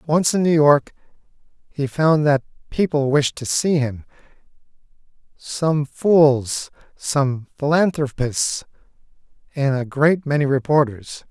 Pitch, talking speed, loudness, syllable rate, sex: 145 Hz, 110 wpm, -19 LUFS, 3.7 syllables/s, male